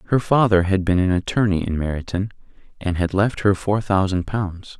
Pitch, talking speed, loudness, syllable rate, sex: 95 Hz, 190 wpm, -20 LUFS, 5.1 syllables/s, male